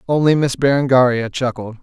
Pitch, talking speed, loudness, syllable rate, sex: 130 Hz, 130 wpm, -16 LUFS, 5.4 syllables/s, male